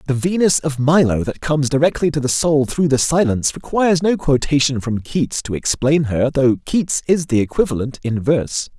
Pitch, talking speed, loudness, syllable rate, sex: 140 Hz, 190 wpm, -17 LUFS, 5.2 syllables/s, male